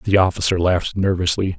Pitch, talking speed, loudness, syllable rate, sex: 90 Hz, 150 wpm, -19 LUFS, 5.8 syllables/s, male